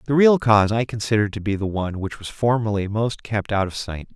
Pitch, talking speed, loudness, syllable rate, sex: 110 Hz, 245 wpm, -21 LUFS, 5.8 syllables/s, male